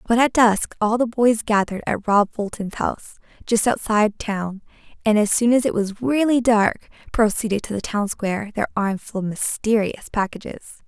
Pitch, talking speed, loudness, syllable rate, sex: 215 Hz, 180 wpm, -21 LUFS, 5.0 syllables/s, female